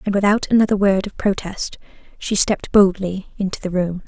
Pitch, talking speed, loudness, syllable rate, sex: 195 Hz, 175 wpm, -19 LUFS, 5.5 syllables/s, female